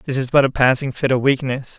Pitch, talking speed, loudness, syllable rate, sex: 130 Hz, 270 wpm, -18 LUFS, 6.1 syllables/s, male